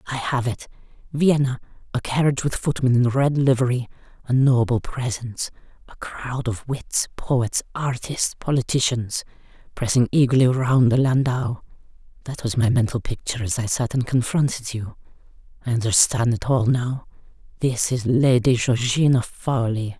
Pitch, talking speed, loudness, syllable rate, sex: 125 Hz, 135 wpm, -21 LUFS, 4.8 syllables/s, female